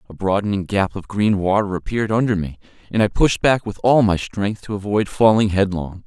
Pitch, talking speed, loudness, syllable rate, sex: 100 Hz, 210 wpm, -19 LUFS, 5.4 syllables/s, male